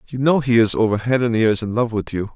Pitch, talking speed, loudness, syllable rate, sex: 115 Hz, 305 wpm, -18 LUFS, 6.0 syllables/s, male